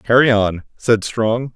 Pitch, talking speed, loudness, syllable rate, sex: 115 Hz, 155 wpm, -17 LUFS, 3.6 syllables/s, male